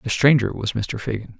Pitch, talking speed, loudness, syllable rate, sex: 115 Hz, 215 wpm, -21 LUFS, 5.4 syllables/s, male